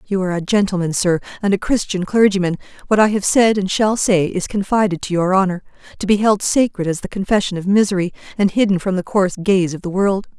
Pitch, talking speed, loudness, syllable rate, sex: 195 Hz, 225 wpm, -17 LUFS, 6.1 syllables/s, female